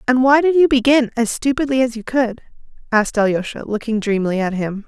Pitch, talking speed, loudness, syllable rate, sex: 240 Hz, 195 wpm, -17 LUFS, 6.0 syllables/s, female